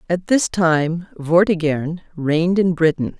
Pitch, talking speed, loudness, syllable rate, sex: 170 Hz, 130 wpm, -18 LUFS, 3.9 syllables/s, female